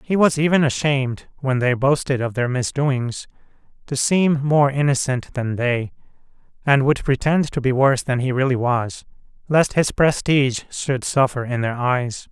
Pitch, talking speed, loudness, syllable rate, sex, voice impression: 135 Hz, 165 wpm, -19 LUFS, 4.6 syllables/s, male, masculine, adult-like, slightly weak, soft, clear, fluent, calm, friendly, reassuring, slightly lively, modest